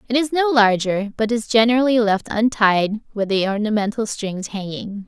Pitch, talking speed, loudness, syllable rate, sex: 220 Hz, 165 wpm, -19 LUFS, 4.9 syllables/s, female